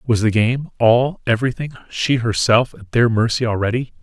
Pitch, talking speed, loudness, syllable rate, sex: 120 Hz, 165 wpm, -18 LUFS, 5.1 syllables/s, male